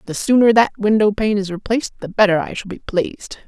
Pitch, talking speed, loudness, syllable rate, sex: 205 Hz, 225 wpm, -17 LUFS, 6.1 syllables/s, female